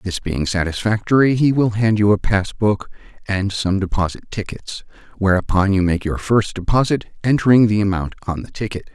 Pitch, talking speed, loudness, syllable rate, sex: 100 Hz, 170 wpm, -18 LUFS, 5.2 syllables/s, male